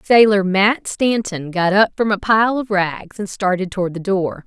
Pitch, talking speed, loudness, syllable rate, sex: 195 Hz, 200 wpm, -17 LUFS, 4.4 syllables/s, female